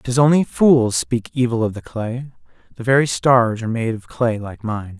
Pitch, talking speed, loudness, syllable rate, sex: 120 Hz, 205 wpm, -18 LUFS, 4.7 syllables/s, male